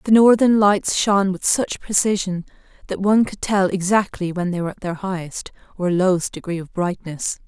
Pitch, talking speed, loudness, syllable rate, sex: 190 Hz, 185 wpm, -19 LUFS, 5.3 syllables/s, female